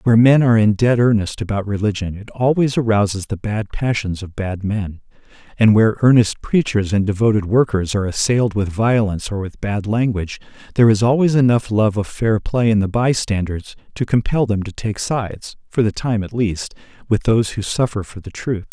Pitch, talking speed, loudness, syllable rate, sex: 110 Hz, 195 wpm, -18 LUFS, 5.5 syllables/s, male